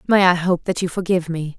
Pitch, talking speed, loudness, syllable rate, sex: 175 Hz, 265 wpm, -19 LUFS, 6.3 syllables/s, female